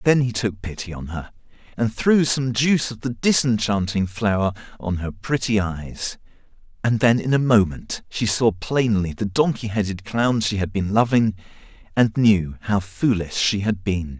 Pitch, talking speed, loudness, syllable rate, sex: 105 Hz, 175 wpm, -21 LUFS, 4.5 syllables/s, male